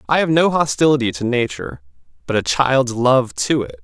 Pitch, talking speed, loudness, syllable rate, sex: 120 Hz, 190 wpm, -17 LUFS, 5.3 syllables/s, male